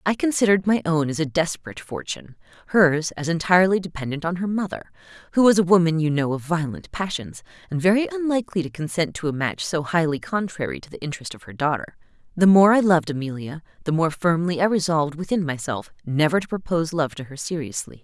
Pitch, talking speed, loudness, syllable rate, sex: 165 Hz, 200 wpm, -22 LUFS, 6.3 syllables/s, female